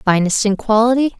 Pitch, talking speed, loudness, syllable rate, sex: 220 Hz, 150 wpm, -15 LUFS, 5.7 syllables/s, female